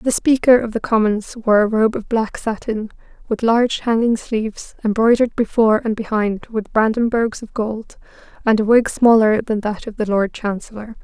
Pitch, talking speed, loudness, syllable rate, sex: 220 Hz, 180 wpm, -18 LUFS, 5.0 syllables/s, female